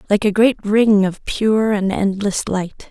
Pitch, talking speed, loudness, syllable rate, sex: 205 Hz, 185 wpm, -17 LUFS, 3.7 syllables/s, female